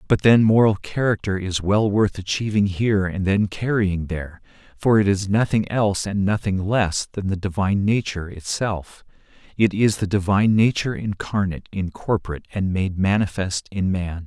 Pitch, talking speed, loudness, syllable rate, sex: 100 Hz, 160 wpm, -21 LUFS, 5.1 syllables/s, male